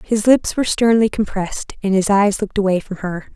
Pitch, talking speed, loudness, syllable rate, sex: 205 Hz, 215 wpm, -17 LUFS, 5.7 syllables/s, female